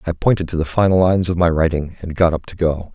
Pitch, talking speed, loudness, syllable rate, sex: 85 Hz, 285 wpm, -17 LUFS, 6.5 syllables/s, male